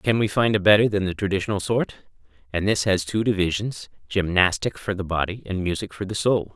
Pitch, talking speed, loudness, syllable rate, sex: 100 Hz, 200 wpm, -23 LUFS, 5.8 syllables/s, male